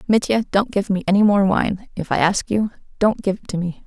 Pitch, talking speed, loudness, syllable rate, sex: 200 Hz, 235 wpm, -19 LUFS, 5.4 syllables/s, female